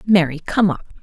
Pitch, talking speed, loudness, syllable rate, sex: 180 Hz, 175 wpm, -18 LUFS, 5.1 syllables/s, female